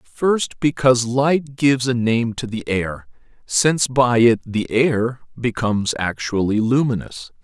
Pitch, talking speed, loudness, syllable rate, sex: 120 Hz, 135 wpm, -19 LUFS, 4.1 syllables/s, male